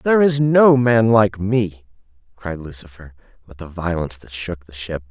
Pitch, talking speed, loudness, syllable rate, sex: 100 Hz, 175 wpm, -18 LUFS, 4.8 syllables/s, male